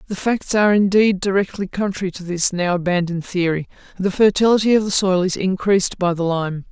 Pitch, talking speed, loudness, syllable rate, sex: 190 Hz, 190 wpm, -18 LUFS, 5.8 syllables/s, female